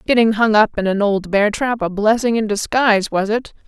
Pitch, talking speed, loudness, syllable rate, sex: 215 Hz, 230 wpm, -17 LUFS, 5.3 syllables/s, female